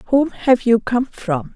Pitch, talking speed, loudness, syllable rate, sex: 235 Hz, 195 wpm, -18 LUFS, 3.3 syllables/s, female